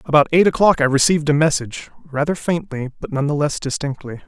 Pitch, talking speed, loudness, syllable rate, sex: 150 Hz, 195 wpm, -18 LUFS, 6.3 syllables/s, male